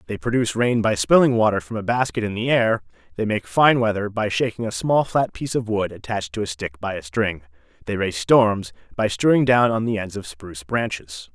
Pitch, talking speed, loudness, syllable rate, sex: 105 Hz, 225 wpm, -21 LUFS, 5.7 syllables/s, male